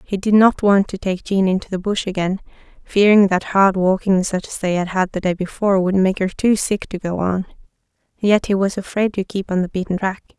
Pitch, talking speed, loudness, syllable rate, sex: 195 Hz, 235 wpm, -18 LUFS, 5.4 syllables/s, female